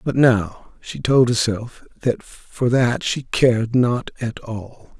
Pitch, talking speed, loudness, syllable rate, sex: 120 Hz, 155 wpm, -20 LUFS, 3.3 syllables/s, male